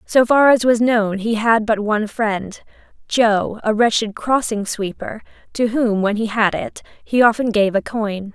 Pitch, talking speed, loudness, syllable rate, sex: 220 Hz, 180 wpm, -17 LUFS, 4.2 syllables/s, female